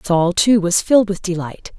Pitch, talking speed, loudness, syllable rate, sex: 190 Hz, 200 wpm, -16 LUFS, 4.8 syllables/s, female